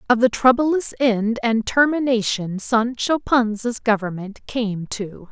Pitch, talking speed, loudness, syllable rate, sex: 230 Hz, 125 wpm, -20 LUFS, 3.8 syllables/s, female